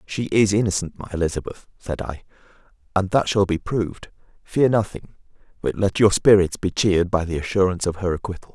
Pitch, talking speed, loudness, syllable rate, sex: 95 Hz, 185 wpm, -21 LUFS, 5.9 syllables/s, male